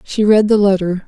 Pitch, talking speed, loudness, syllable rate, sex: 200 Hz, 225 wpm, -13 LUFS, 5.2 syllables/s, female